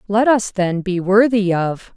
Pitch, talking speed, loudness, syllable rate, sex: 200 Hz, 185 wpm, -17 LUFS, 4.0 syllables/s, female